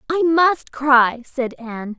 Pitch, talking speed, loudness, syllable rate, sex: 270 Hz, 150 wpm, -17 LUFS, 3.6 syllables/s, female